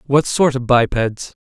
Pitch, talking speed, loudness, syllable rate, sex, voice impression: 130 Hz, 165 wpm, -16 LUFS, 4.2 syllables/s, male, very masculine, very adult-like, very middle-aged, very thick, slightly tensed, slightly powerful, slightly dark, hard, clear, fluent, slightly raspy, very cool, intellectual, refreshing, very sincere, calm, mature, very friendly, very reassuring, unique, elegant, slightly wild, sweet, slightly lively, kind, slightly modest